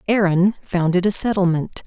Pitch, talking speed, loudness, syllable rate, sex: 185 Hz, 130 wpm, -18 LUFS, 4.9 syllables/s, female